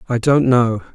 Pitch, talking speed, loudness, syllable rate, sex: 120 Hz, 190 wpm, -15 LUFS, 4.5 syllables/s, male